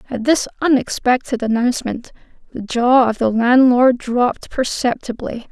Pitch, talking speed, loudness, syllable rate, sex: 245 Hz, 120 wpm, -17 LUFS, 4.6 syllables/s, female